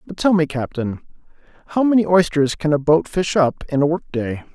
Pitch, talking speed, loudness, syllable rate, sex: 160 Hz, 200 wpm, -19 LUFS, 5.4 syllables/s, male